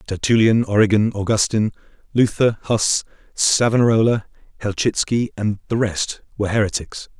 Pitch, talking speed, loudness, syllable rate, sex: 110 Hz, 100 wpm, -19 LUFS, 5.2 syllables/s, male